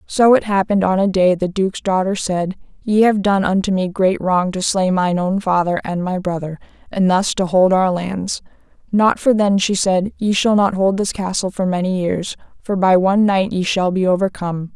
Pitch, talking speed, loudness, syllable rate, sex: 190 Hz, 215 wpm, -17 LUFS, 5.0 syllables/s, female